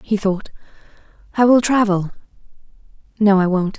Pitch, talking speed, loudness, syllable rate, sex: 205 Hz, 110 wpm, -17 LUFS, 5.2 syllables/s, female